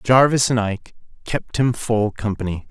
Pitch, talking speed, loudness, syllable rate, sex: 115 Hz, 155 wpm, -20 LUFS, 4.7 syllables/s, male